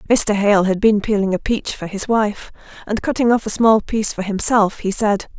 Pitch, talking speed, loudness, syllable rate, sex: 210 Hz, 225 wpm, -17 LUFS, 5.0 syllables/s, female